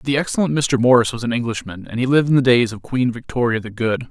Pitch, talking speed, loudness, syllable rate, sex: 125 Hz, 265 wpm, -18 LUFS, 6.4 syllables/s, male